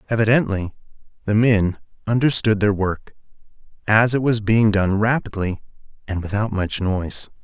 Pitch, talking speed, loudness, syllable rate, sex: 105 Hz, 130 wpm, -19 LUFS, 4.8 syllables/s, male